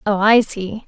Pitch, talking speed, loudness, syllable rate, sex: 205 Hz, 205 wpm, -15 LUFS, 4.1 syllables/s, female